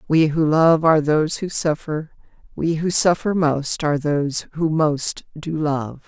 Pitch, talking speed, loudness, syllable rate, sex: 155 Hz, 170 wpm, -20 LUFS, 4.3 syllables/s, female